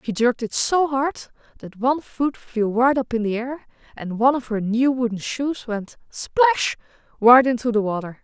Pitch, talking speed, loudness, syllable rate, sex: 245 Hz, 180 wpm, -21 LUFS, 4.8 syllables/s, female